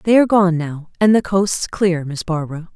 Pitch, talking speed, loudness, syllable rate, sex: 180 Hz, 220 wpm, -17 LUFS, 5.2 syllables/s, female